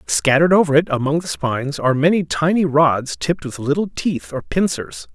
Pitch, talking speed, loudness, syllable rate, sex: 150 Hz, 185 wpm, -18 LUFS, 5.5 syllables/s, male